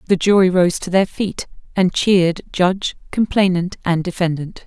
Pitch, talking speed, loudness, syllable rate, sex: 185 Hz, 155 wpm, -17 LUFS, 4.8 syllables/s, female